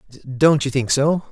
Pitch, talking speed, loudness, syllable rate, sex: 135 Hz, 185 wpm, -18 LUFS, 5.0 syllables/s, male